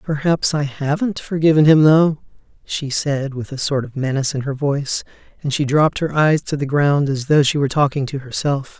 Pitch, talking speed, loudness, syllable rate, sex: 145 Hz, 210 wpm, -18 LUFS, 5.3 syllables/s, male